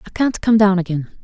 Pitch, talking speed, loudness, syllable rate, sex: 195 Hz, 245 wpm, -16 LUFS, 5.7 syllables/s, female